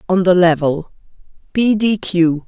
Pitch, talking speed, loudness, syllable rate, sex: 180 Hz, 120 wpm, -15 LUFS, 4.1 syllables/s, female